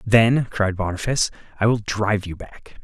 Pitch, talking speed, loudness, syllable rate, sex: 105 Hz, 170 wpm, -21 LUFS, 5.1 syllables/s, male